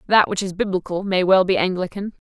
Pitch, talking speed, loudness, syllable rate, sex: 185 Hz, 210 wpm, -20 LUFS, 6.0 syllables/s, female